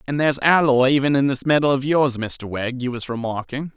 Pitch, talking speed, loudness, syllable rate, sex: 135 Hz, 225 wpm, -20 LUFS, 5.5 syllables/s, male